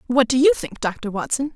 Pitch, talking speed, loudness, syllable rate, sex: 255 Hz, 230 wpm, -20 LUFS, 5.2 syllables/s, female